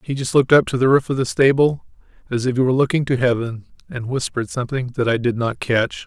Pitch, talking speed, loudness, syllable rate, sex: 125 Hz, 245 wpm, -19 LUFS, 6.5 syllables/s, male